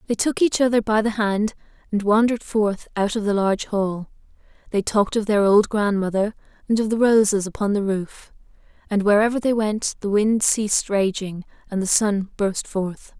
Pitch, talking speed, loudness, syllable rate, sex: 210 Hz, 185 wpm, -21 LUFS, 5.1 syllables/s, female